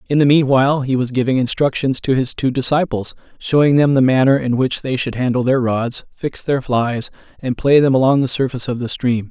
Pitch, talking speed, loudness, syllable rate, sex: 130 Hz, 220 wpm, -16 LUFS, 5.5 syllables/s, male